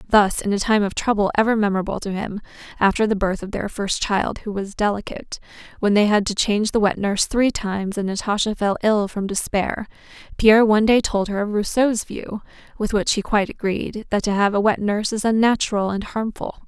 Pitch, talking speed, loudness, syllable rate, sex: 210 Hz, 210 wpm, -20 LUFS, 5.8 syllables/s, female